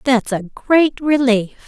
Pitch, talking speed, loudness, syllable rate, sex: 250 Hz, 145 wpm, -16 LUFS, 3.5 syllables/s, female